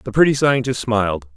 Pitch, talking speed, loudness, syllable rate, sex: 120 Hz, 175 wpm, -18 LUFS, 5.5 syllables/s, male